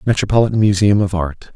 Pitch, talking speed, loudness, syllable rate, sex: 100 Hz, 155 wpm, -15 LUFS, 6.3 syllables/s, male